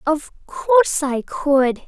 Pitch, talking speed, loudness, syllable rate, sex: 305 Hz, 130 wpm, -18 LUFS, 3.1 syllables/s, female